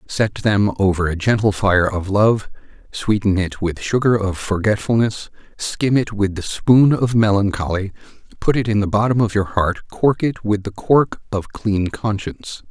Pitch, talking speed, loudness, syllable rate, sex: 105 Hz, 175 wpm, -18 LUFS, 4.5 syllables/s, male